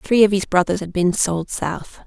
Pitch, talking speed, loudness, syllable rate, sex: 185 Hz, 235 wpm, -19 LUFS, 4.5 syllables/s, female